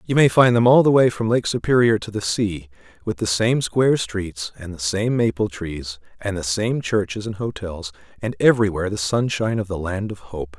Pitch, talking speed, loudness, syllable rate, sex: 105 Hz, 215 wpm, -20 LUFS, 5.3 syllables/s, male